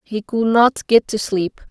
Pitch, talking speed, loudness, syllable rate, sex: 220 Hz, 210 wpm, -17 LUFS, 3.8 syllables/s, female